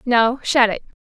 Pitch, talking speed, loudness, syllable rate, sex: 235 Hz, 175 wpm, -17 LUFS, 4.1 syllables/s, female